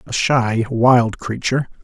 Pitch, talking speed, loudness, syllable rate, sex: 120 Hz, 130 wpm, -17 LUFS, 3.9 syllables/s, male